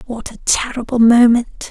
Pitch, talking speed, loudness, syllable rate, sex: 235 Hz, 140 wpm, -14 LUFS, 4.5 syllables/s, female